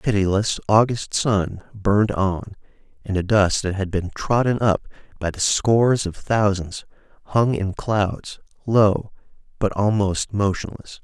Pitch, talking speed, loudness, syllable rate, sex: 105 Hz, 140 wpm, -21 LUFS, 4.1 syllables/s, male